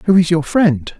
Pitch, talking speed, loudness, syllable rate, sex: 170 Hz, 240 wpm, -14 LUFS, 4.2 syllables/s, male